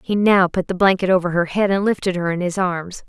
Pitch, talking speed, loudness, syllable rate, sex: 185 Hz, 275 wpm, -18 LUFS, 5.7 syllables/s, female